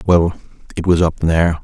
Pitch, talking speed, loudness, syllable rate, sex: 85 Hz, 185 wpm, -16 LUFS, 5.5 syllables/s, male